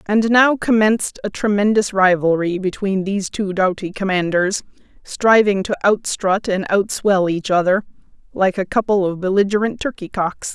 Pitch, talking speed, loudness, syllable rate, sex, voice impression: 195 Hz, 140 wpm, -18 LUFS, 4.8 syllables/s, female, feminine, very adult-like, slightly muffled, slightly fluent, slightly friendly, slightly unique